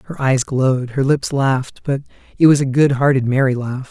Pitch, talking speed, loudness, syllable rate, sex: 135 Hz, 215 wpm, -17 LUFS, 5.4 syllables/s, male